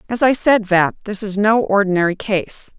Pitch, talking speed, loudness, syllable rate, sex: 205 Hz, 195 wpm, -16 LUFS, 4.9 syllables/s, female